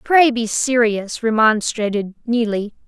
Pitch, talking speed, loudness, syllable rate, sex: 225 Hz, 105 wpm, -18 LUFS, 3.9 syllables/s, female